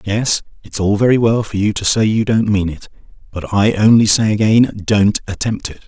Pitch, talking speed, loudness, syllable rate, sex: 105 Hz, 195 wpm, -15 LUFS, 5.0 syllables/s, male